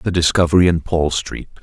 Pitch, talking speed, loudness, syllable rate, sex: 85 Hz, 185 wpm, -16 LUFS, 5.4 syllables/s, male